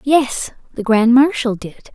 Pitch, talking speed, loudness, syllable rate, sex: 245 Hz, 155 wpm, -15 LUFS, 3.7 syllables/s, female